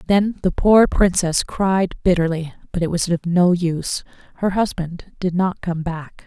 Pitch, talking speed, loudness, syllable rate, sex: 180 Hz, 170 wpm, -19 LUFS, 4.4 syllables/s, female